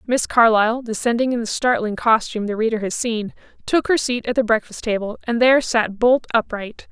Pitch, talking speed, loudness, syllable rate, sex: 230 Hz, 200 wpm, -19 LUFS, 5.5 syllables/s, female